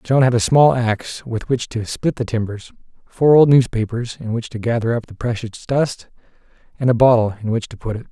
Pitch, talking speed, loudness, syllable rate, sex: 120 Hz, 220 wpm, -18 LUFS, 5.4 syllables/s, male